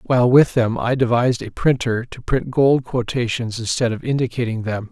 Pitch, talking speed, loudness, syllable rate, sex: 120 Hz, 185 wpm, -19 LUFS, 5.2 syllables/s, male